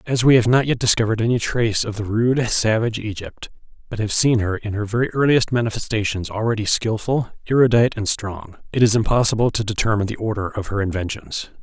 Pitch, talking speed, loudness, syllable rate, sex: 110 Hz, 190 wpm, -20 LUFS, 6.2 syllables/s, male